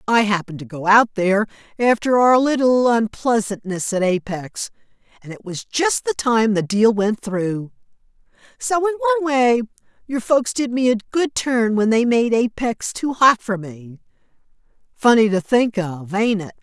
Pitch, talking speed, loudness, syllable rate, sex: 225 Hz, 170 wpm, -19 LUFS, 4.6 syllables/s, female